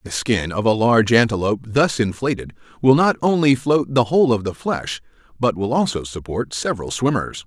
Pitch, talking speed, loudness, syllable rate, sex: 115 Hz, 185 wpm, -19 LUFS, 5.4 syllables/s, male